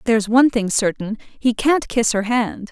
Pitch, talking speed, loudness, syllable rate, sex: 230 Hz, 175 wpm, -18 LUFS, 5.2 syllables/s, female